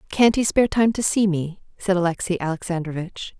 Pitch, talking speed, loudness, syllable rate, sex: 185 Hz, 175 wpm, -21 LUFS, 5.5 syllables/s, female